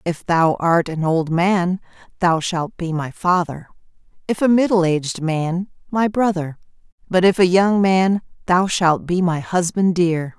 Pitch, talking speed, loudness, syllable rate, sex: 175 Hz, 170 wpm, -18 LUFS, 4.1 syllables/s, female